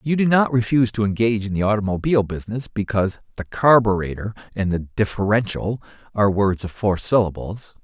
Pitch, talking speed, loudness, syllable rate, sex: 105 Hz, 160 wpm, -20 LUFS, 6.1 syllables/s, male